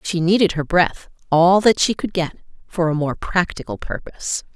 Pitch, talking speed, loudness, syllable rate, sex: 175 Hz, 185 wpm, -19 LUFS, 4.9 syllables/s, female